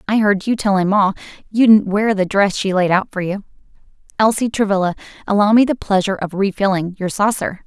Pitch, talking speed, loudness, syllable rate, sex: 200 Hz, 195 wpm, -16 LUFS, 5.8 syllables/s, female